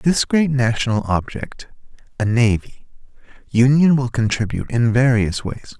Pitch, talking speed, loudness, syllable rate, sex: 120 Hz, 135 wpm, -18 LUFS, 4.8 syllables/s, male